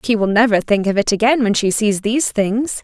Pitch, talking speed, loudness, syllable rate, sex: 220 Hz, 255 wpm, -16 LUFS, 5.5 syllables/s, female